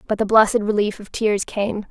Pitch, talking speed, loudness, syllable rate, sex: 210 Hz, 220 wpm, -19 LUFS, 5.2 syllables/s, female